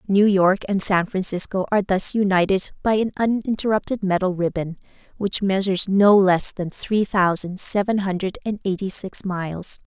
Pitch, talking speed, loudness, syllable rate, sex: 195 Hz, 155 wpm, -20 LUFS, 4.9 syllables/s, female